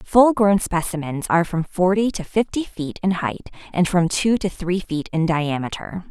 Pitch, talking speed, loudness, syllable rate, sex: 180 Hz, 185 wpm, -21 LUFS, 4.7 syllables/s, female